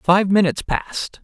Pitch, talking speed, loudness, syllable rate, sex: 190 Hz, 145 wpm, -19 LUFS, 5.0 syllables/s, male